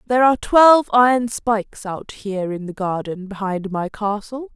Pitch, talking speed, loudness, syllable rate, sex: 215 Hz, 170 wpm, -18 LUFS, 5.1 syllables/s, female